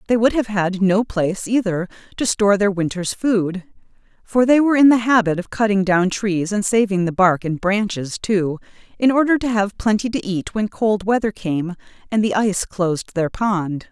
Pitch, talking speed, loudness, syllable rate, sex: 205 Hz, 200 wpm, -19 LUFS, 4.9 syllables/s, female